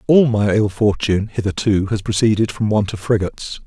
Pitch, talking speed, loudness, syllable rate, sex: 105 Hz, 180 wpm, -18 LUFS, 5.4 syllables/s, male